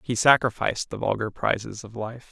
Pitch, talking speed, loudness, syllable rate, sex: 115 Hz, 180 wpm, -24 LUFS, 5.5 syllables/s, male